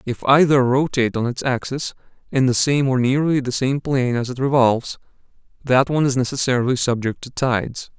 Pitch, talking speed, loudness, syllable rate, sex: 130 Hz, 180 wpm, -19 LUFS, 5.7 syllables/s, male